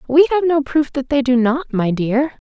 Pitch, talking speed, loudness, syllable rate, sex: 275 Hz, 245 wpm, -17 LUFS, 4.6 syllables/s, female